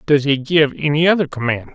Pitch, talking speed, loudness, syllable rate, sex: 145 Hz, 205 wpm, -16 LUFS, 5.7 syllables/s, male